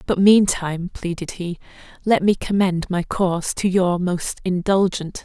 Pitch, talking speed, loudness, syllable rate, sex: 185 Hz, 150 wpm, -20 LUFS, 4.4 syllables/s, female